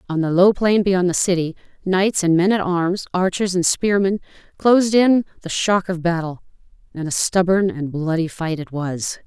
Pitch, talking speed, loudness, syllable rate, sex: 180 Hz, 190 wpm, -19 LUFS, 4.7 syllables/s, female